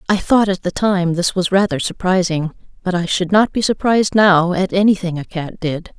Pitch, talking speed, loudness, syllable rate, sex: 185 Hz, 210 wpm, -16 LUFS, 5.1 syllables/s, female